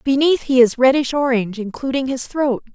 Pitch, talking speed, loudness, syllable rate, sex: 260 Hz, 175 wpm, -17 LUFS, 5.5 syllables/s, female